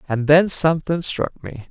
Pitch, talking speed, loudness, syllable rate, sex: 155 Hz, 175 wpm, -18 LUFS, 4.5 syllables/s, male